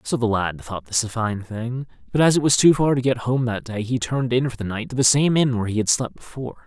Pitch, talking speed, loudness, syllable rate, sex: 120 Hz, 305 wpm, -21 LUFS, 6.0 syllables/s, male